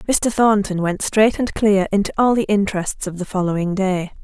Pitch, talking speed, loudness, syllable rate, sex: 200 Hz, 200 wpm, -18 LUFS, 5.2 syllables/s, female